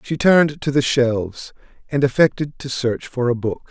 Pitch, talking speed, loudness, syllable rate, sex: 135 Hz, 195 wpm, -19 LUFS, 4.9 syllables/s, male